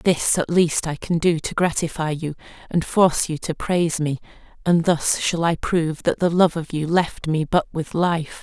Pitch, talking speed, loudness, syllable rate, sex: 165 Hz, 215 wpm, -21 LUFS, 4.7 syllables/s, female